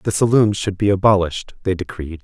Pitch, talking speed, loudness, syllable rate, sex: 95 Hz, 190 wpm, -18 LUFS, 5.7 syllables/s, male